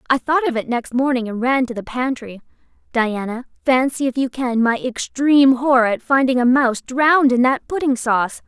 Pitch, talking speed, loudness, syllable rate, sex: 255 Hz, 200 wpm, -18 LUFS, 5.3 syllables/s, female